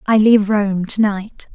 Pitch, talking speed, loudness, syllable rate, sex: 205 Hz, 195 wpm, -15 LUFS, 4.3 syllables/s, female